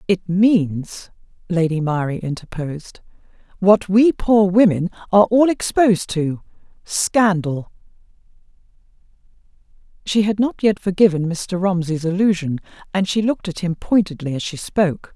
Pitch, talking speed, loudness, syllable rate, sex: 185 Hz, 120 wpm, -18 LUFS, 4.7 syllables/s, female